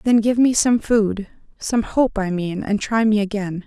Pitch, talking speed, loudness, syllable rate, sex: 215 Hz, 195 wpm, -19 LUFS, 4.3 syllables/s, female